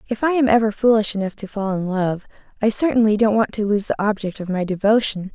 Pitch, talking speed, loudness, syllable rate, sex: 210 Hz, 235 wpm, -19 LUFS, 6.0 syllables/s, female